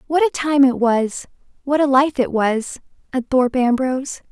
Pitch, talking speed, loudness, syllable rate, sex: 265 Hz, 165 wpm, -18 LUFS, 4.7 syllables/s, female